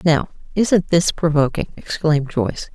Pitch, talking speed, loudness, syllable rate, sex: 160 Hz, 130 wpm, -19 LUFS, 4.7 syllables/s, female